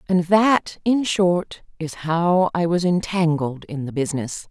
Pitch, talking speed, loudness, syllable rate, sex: 170 Hz, 160 wpm, -20 LUFS, 3.9 syllables/s, female